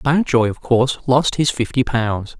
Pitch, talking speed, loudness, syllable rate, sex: 125 Hz, 175 wpm, -18 LUFS, 4.6 syllables/s, male